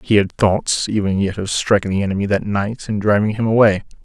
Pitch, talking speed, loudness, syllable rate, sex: 105 Hz, 225 wpm, -17 LUFS, 5.6 syllables/s, male